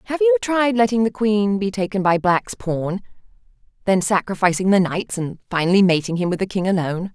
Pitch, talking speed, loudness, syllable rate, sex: 200 Hz, 195 wpm, -19 LUFS, 5.6 syllables/s, female